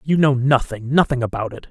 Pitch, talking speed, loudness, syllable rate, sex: 130 Hz, 210 wpm, -19 LUFS, 5.7 syllables/s, male